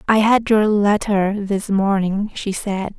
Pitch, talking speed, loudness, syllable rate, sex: 205 Hz, 160 wpm, -18 LUFS, 3.6 syllables/s, female